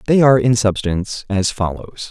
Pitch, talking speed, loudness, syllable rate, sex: 110 Hz, 170 wpm, -17 LUFS, 5.3 syllables/s, male